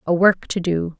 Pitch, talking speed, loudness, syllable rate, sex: 175 Hz, 240 wpm, -19 LUFS, 4.6 syllables/s, female